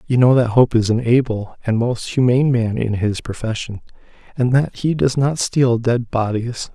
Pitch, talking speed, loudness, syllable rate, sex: 120 Hz, 195 wpm, -18 LUFS, 4.7 syllables/s, male